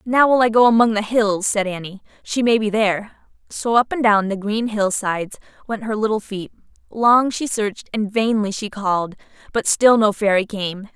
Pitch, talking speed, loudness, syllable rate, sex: 215 Hz, 205 wpm, -18 LUFS, 5.0 syllables/s, female